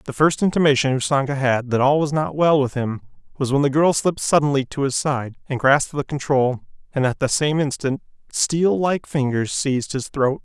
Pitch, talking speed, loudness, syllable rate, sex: 140 Hz, 205 wpm, -20 LUFS, 5.2 syllables/s, male